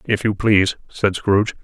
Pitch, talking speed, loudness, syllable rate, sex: 100 Hz, 185 wpm, -18 LUFS, 5.1 syllables/s, male